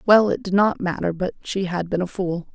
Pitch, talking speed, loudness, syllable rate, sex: 190 Hz, 260 wpm, -22 LUFS, 5.1 syllables/s, female